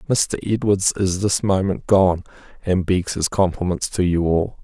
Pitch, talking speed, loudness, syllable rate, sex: 95 Hz, 170 wpm, -20 LUFS, 4.3 syllables/s, male